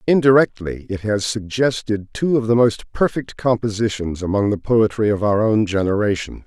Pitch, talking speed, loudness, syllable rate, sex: 110 Hz, 160 wpm, -19 LUFS, 5.0 syllables/s, male